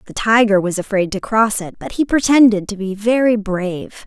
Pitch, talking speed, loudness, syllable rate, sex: 210 Hz, 205 wpm, -16 LUFS, 5.2 syllables/s, female